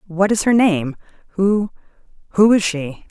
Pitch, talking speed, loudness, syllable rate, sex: 195 Hz, 115 wpm, -17 LUFS, 4.3 syllables/s, female